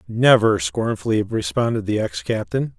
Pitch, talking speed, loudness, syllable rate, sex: 115 Hz, 130 wpm, -20 LUFS, 4.6 syllables/s, male